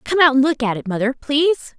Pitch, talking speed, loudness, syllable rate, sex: 275 Hz, 270 wpm, -17 LUFS, 6.1 syllables/s, female